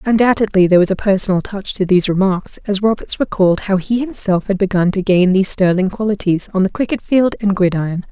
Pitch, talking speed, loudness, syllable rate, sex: 195 Hz, 205 wpm, -15 LUFS, 6.1 syllables/s, female